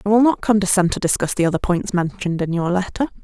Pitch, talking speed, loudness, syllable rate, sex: 190 Hz, 240 wpm, -19 LUFS, 6.7 syllables/s, female